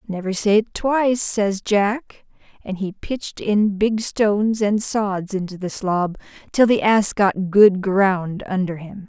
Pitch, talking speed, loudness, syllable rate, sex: 200 Hz, 160 wpm, -19 LUFS, 3.6 syllables/s, female